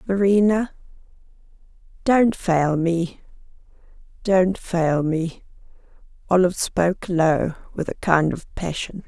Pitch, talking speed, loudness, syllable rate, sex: 180 Hz, 95 wpm, -21 LUFS, 3.8 syllables/s, female